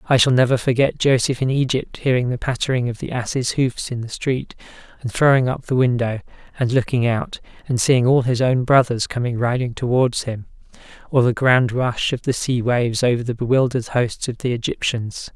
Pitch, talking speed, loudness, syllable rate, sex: 125 Hz, 195 wpm, -19 LUFS, 5.3 syllables/s, male